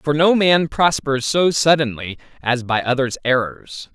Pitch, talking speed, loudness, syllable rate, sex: 140 Hz, 150 wpm, -17 LUFS, 4.2 syllables/s, male